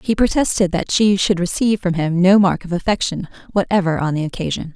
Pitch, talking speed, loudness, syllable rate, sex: 185 Hz, 200 wpm, -17 LUFS, 5.9 syllables/s, female